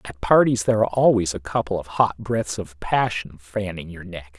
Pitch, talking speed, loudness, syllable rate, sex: 95 Hz, 205 wpm, -22 LUFS, 5.2 syllables/s, male